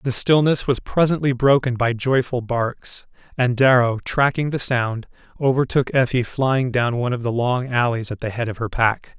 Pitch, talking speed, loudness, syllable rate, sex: 125 Hz, 185 wpm, -20 LUFS, 4.8 syllables/s, male